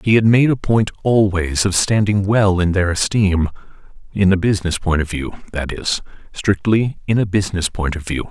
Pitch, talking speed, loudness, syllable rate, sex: 95 Hz, 195 wpm, -17 LUFS, 5.1 syllables/s, male